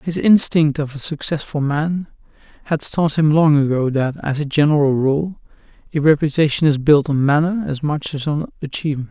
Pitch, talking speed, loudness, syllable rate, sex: 150 Hz, 180 wpm, -18 LUFS, 5.1 syllables/s, male